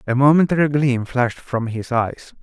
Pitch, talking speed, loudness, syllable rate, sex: 130 Hz, 175 wpm, -19 LUFS, 4.9 syllables/s, male